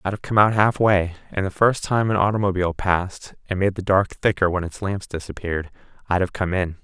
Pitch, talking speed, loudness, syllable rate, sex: 95 Hz, 220 wpm, -21 LUFS, 5.7 syllables/s, male